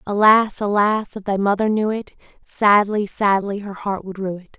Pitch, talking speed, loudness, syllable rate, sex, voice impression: 205 Hz, 185 wpm, -19 LUFS, 4.6 syllables/s, female, very feminine, slightly adult-like, slightly soft, slightly cute, calm, slightly sweet, slightly kind